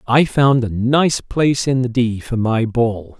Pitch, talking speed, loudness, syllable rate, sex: 125 Hz, 205 wpm, -17 LUFS, 3.9 syllables/s, male